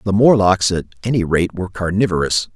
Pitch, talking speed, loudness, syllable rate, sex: 95 Hz, 165 wpm, -17 LUFS, 5.8 syllables/s, male